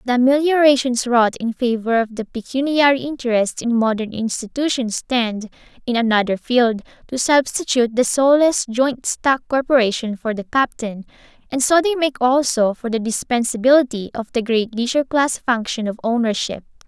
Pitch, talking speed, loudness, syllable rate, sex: 245 Hz, 150 wpm, -18 LUFS, 5.0 syllables/s, female